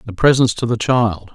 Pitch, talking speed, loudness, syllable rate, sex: 115 Hz, 225 wpm, -16 LUFS, 5.0 syllables/s, male